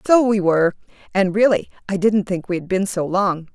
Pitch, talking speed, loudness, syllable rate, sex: 195 Hz, 205 wpm, -19 LUFS, 5.4 syllables/s, female